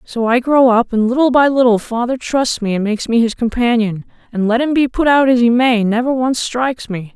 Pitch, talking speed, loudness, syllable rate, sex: 240 Hz, 245 wpm, -14 LUFS, 5.5 syllables/s, female